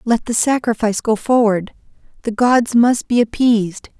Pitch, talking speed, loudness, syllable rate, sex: 225 Hz, 150 wpm, -16 LUFS, 4.8 syllables/s, female